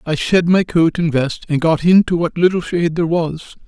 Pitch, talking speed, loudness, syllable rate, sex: 165 Hz, 230 wpm, -16 LUFS, 5.2 syllables/s, male